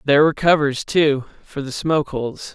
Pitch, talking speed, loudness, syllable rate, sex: 145 Hz, 190 wpm, -19 LUFS, 5.6 syllables/s, male